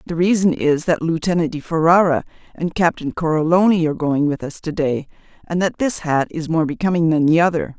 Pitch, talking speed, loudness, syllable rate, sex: 165 Hz, 200 wpm, -18 LUFS, 5.7 syllables/s, female